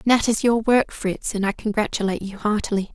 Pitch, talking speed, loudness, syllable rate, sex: 210 Hz, 205 wpm, -22 LUFS, 5.7 syllables/s, female